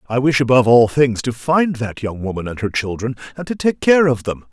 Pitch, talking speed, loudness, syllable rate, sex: 125 Hz, 250 wpm, -17 LUFS, 5.5 syllables/s, male